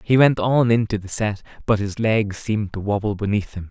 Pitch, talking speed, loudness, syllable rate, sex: 105 Hz, 225 wpm, -21 LUFS, 5.3 syllables/s, male